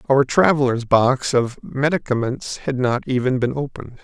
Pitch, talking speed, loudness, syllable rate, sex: 130 Hz, 150 wpm, -19 LUFS, 4.8 syllables/s, male